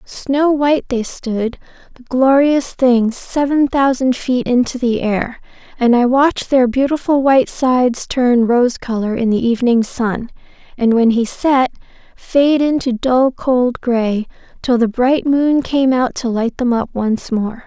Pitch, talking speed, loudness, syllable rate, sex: 250 Hz, 165 wpm, -15 LUFS, 4.0 syllables/s, female